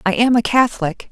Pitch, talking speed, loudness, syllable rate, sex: 225 Hz, 215 wpm, -16 LUFS, 6.3 syllables/s, female